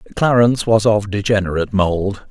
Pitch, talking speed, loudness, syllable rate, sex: 105 Hz, 130 wpm, -16 LUFS, 5.5 syllables/s, male